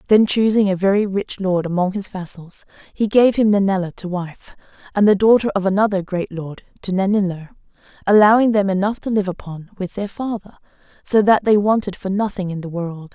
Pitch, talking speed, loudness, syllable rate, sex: 195 Hz, 190 wpm, -18 LUFS, 5.4 syllables/s, female